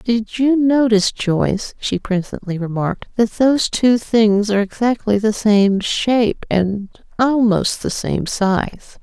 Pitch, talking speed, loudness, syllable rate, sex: 215 Hz, 140 wpm, -17 LUFS, 3.9 syllables/s, female